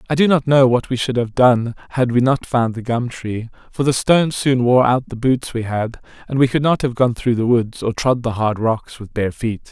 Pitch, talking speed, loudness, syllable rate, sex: 125 Hz, 265 wpm, -18 LUFS, 5.0 syllables/s, male